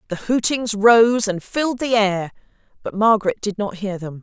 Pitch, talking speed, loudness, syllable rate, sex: 215 Hz, 170 wpm, -18 LUFS, 4.9 syllables/s, female